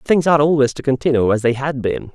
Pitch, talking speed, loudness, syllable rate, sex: 135 Hz, 250 wpm, -17 LUFS, 5.7 syllables/s, male